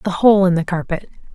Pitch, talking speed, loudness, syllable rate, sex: 185 Hz, 225 wpm, -17 LUFS, 5.6 syllables/s, female